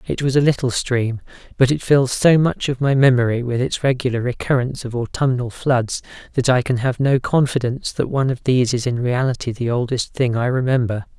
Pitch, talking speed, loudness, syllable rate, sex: 125 Hz, 205 wpm, -19 LUFS, 5.7 syllables/s, male